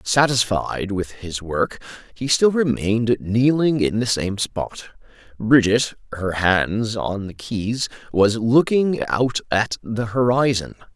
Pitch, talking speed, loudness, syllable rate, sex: 115 Hz, 130 wpm, -20 LUFS, 3.7 syllables/s, male